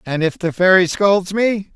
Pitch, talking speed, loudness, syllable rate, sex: 185 Hz, 205 wpm, -16 LUFS, 4.3 syllables/s, male